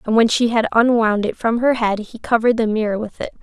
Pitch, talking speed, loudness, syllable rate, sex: 225 Hz, 265 wpm, -18 LUFS, 5.9 syllables/s, female